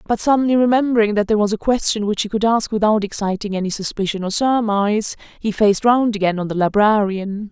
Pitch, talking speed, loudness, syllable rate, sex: 210 Hz, 200 wpm, -18 LUFS, 6.2 syllables/s, female